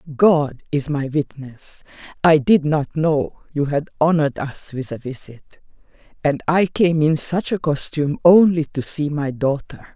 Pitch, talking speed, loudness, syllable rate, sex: 150 Hz, 165 wpm, -19 LUFS, 4.3 syllables/s, female